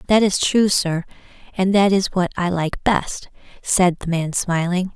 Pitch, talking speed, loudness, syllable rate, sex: 180 Hz, 180 wpm, -19 LUFS, 4.1 syllables/s, female